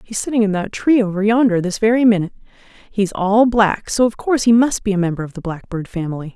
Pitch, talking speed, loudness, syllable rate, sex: 205 Hz, 235 wpm, -17 LUFS, 6.4 syllables/s, female